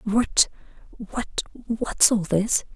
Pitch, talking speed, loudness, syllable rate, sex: 215 Hz, 65 wpm, -23 LUFS, 2.6 syllables/s, female